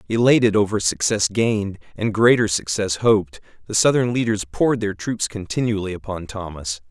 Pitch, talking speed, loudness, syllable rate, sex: 105 Hz, 150 wpm, -20 LUFS, 5.3 syllables/s, male